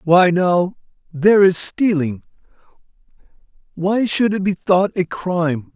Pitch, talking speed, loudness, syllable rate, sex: 180 Hz, 125 wpm, -17 LUFS, 4.0 syllables/s, male